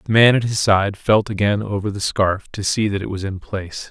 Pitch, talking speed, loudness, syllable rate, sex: 100 Hz, 260 wpm, -19 LUFS, 5.3 syllables/s, male